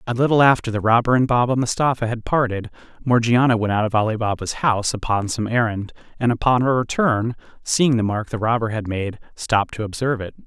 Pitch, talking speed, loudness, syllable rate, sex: 115 Hz, 200 wpm, -20 LUFS, 5.9 syllables/s, male